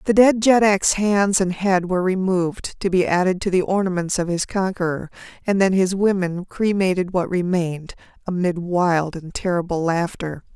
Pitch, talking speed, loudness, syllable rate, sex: 185 Hz, 165 wpm, -20 LUFS, 4.9 syllables/s, female